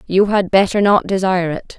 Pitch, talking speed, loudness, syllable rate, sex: 190 Hz, 200 wpm, -15 LUFS, 5.5 syllables/s, female